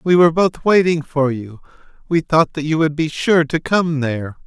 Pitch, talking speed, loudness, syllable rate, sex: 155 Hz, 215 wpm, -17 LUFS, 5.0 syllables/s, male